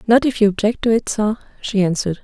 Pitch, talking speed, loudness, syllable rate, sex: 215 Hz, 240 wpm, -18 LUFS, 6.4 syllables/s, female